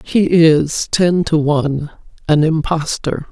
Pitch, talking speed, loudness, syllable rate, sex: 160 Hz, 125 wpm, -15 LUFS, 3.5 syllables/s, female